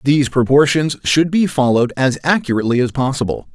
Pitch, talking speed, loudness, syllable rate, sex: 135 Hz, 150 wpm, -15 LUFS, 6.1 syllables/s, male